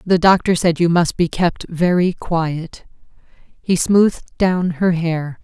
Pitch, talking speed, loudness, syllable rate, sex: 175 Hz, 155 wpm, -17 LUFS, 3.7 syllables/s, female